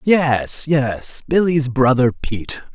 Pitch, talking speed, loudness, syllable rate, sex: 135 Hz, 110 wpm, -18 LUFS, 3.3 syllables/s, male